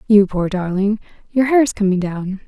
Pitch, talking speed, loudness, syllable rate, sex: 205 Hz, 170 wpm, -18 LUFS, 4.6 syllables/s, female